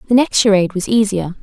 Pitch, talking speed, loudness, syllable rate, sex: 210 Hz, 210 wpm, -14 LUFS, 6.6 syllables/s, female